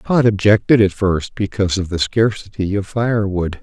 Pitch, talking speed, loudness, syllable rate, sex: 100 Hz, 180 wpm, -17 LUFS, 4.8 syllables/s, male